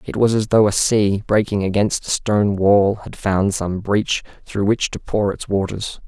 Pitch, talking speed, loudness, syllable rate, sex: 100 Hz, 205 wpm, -18 LUFS, 4.4 syllables/s, male